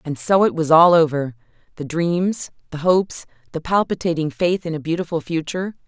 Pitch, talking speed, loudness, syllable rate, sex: 160 Hz, 165 wpm, -19 LUFS, 5.5 syllables/s, female